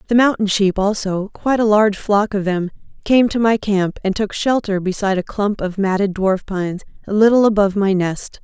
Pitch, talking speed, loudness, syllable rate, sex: 200 Hz, 205 wpm, -17 LUFS, 5.5 syllables/s, female